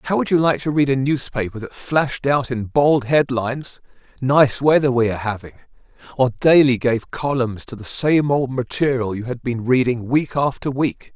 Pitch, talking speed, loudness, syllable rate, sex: 130 Hz, 190 wpm, -19 LUFS, 4.9 syllables/s, male